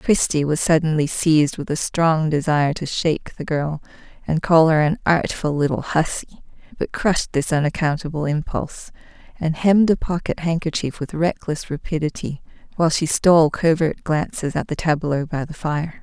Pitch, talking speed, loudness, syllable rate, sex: 155 Hz, 160 wpm, -20 LUFS, 5.1 syllables/s, female